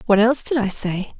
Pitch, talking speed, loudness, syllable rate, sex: 220 Hz, 250 wpm, -19 LUFS, 6.1 syllables/s, female